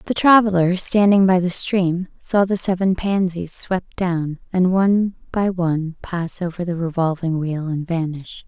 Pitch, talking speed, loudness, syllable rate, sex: 180 Hz, 165 wpm, -19 LUFS, 4.3 syllables/s, female